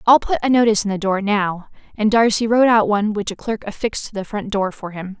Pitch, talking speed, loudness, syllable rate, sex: 210 Hz, 265 wpm, -18 LUFS, 6.4 syllables/s, female